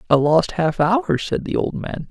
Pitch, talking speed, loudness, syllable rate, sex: 175 Hz, 230 wpm, -19 LUFS, 4.2 syllables/s, male